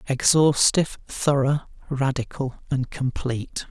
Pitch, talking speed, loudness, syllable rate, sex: 135 Hz, 80 wpm, -23 LUFS, 4.3 syllables/s, male